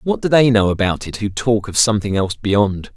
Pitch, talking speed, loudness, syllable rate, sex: 110 Hz, 245 wpm, -17 LUFS, 5.6 syllables/s, male